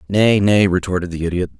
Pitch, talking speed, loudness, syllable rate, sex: 95 Hz, 190 wpm, -17 LUFS, 5.8 syllables/s, male